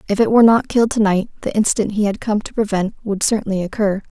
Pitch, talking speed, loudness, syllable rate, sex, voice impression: 210 Hz, 230 wpm, -17 LUFS, 6.9 syllables/s, female, feminine, slightly adult-like, fluent, slightly cute, slightly sincere, slightly calm, friendly